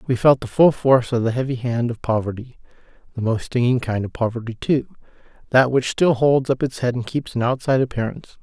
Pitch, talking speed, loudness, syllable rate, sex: 125 Hz, 205 wpm, -20 LUFS, 6.0 syllables/s, male